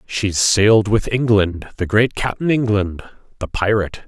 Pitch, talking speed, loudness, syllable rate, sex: 105 Hz, 145 wpm, -17 LUFS, 4.3 syllables/s, male